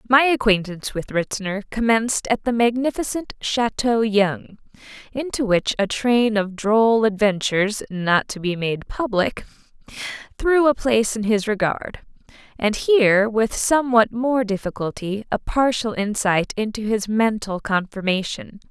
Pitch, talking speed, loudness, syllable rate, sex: 220 Hz, 130 wpm, -20 LUFS, 4.5 syllables/s, female